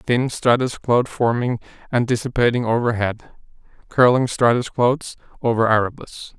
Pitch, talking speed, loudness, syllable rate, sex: 120 Hz, 115 wpm, -19 LUFS, 4.6 syllables/s, male